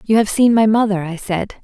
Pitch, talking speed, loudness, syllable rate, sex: 210 Hz, 255 wpm, -16 LUFS, 5.5 syllables/s, female